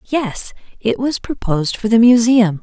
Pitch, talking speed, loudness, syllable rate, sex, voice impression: 225 Hz, 160 wpm, -16 LUFS, 4.6 syllables/s, female, feminine, adult-like, slightly soft, slightly cute, calm, friendly, slightly reassuring, slightly sweet, slightly kind